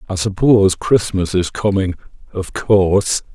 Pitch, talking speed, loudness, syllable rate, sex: 95 Hz, 125 wpm, -16 LUFS, 4.5 syllables/s, male